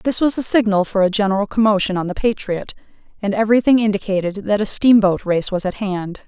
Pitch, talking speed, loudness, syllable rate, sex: 205 Hz, 200 wpm, -17 LUFS, 6.0 syllables/s, female